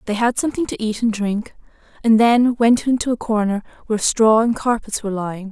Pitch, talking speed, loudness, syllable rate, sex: 225 Hz, 205 wpm, -18 LUFS, 5.8 syllables/s, female